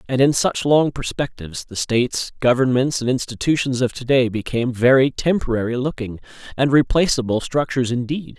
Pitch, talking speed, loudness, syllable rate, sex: 130 Hz, 150 wpm, -19 LUFS, 5.6 syllables/s, male